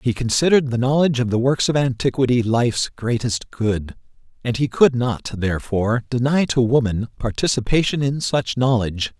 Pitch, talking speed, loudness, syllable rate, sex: 125 Hz, 155 wpm, -20 LUFS, 5.4 syllables/s, male